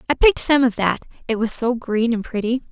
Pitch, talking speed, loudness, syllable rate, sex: 240 Hz, 245 wpm, -19 LUFS, 5.8 syllables/s, female